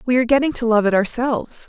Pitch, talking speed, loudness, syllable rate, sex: 240 Hz, 250 wpm, -18 LUFS, 7.1 syllables/s, female